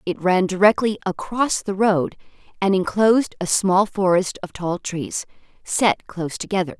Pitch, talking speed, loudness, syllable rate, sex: 190 Hz, 150 wpm, -20 LUFS, 4.6 syllables/s, female